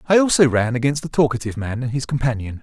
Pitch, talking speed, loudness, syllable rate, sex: 130 Hz, 230 wpm, -19 LUFS, 6.8 syllables/s, male